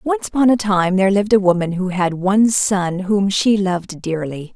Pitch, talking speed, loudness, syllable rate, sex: 195 Hz, 210 wpm, -17 LUFS, 5.1 syllables/s, female